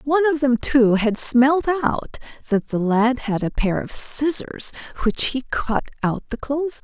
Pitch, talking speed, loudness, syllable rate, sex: 255 Hz, 195 wpm, -20 LUFS, 4.3 syllables/s, female